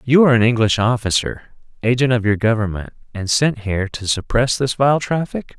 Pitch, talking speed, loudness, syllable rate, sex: 120 Hz, 185 wpm, -18 LUFS, 5.4 syllables/s, male